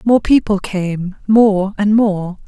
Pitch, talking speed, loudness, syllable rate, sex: 200 Hz, 120 wpm, -15 LUFS, 3.2 syllables/s, female